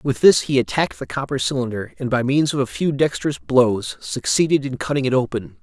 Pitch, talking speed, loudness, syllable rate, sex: 130 Hz, 215 wpm, -20 LUFS, 5.7 syllables/s, male